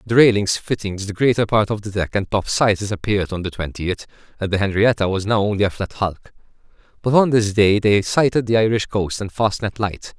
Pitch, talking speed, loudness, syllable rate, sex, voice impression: 105 Hz, 220 wpm, -19 LUFS, 5.7 syllables/s, male, very masculine, very adult-like, middle-aged, very thick, slightly tensed, powerful, bright, hard, slightly muffled, slightly halting, slightly raspy, cool, intellectual, slightly refreshing, sincere, slightly calm, mature, friendly, reassuring, unique, slightly elegant, wild, slightly sweet, lively, kind, slightly intense